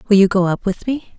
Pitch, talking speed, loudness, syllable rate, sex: 205 Hz, 305 wpm, -17 LUFS, 5.9 syllables/s, female